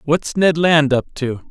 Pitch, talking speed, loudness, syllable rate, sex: 150 Hz, 200 wpm, -16 LUFS, 3.9 syllables/s, male